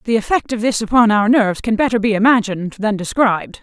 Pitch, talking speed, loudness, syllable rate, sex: 220 Hz, 215 wpm, -16 LUFS, 6.4 syllables/s, female